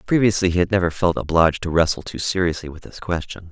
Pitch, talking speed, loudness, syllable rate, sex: 85 Hz, 220 wpm, -20 LUFS, 6.5 syllables/s, male